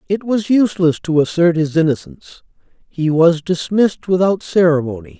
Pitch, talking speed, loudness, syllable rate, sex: 170 Hz, 140 wpm, -16 LUFS, 5.3 syllables/s, male